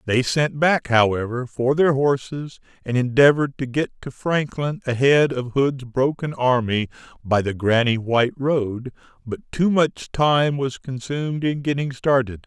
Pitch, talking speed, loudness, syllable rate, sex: 130 Hz, 155 wpm, -21 LUFS, 4.4 syllables/s, male